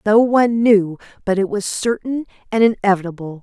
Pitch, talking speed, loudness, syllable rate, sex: 205 Hz, 160 wpm, -17 LUFS, 5.4 syllables/s, female